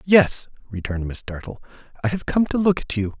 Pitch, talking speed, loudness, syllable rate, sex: 135 Hz, 205 wpm, -22 LUFS, 5.7 syllables/s, male